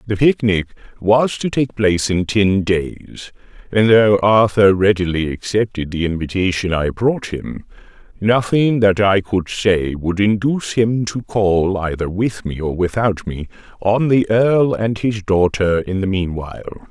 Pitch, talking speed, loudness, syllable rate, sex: 100 Hz, 155 wpm, -17 LUFS, 4.2 syllables/s, male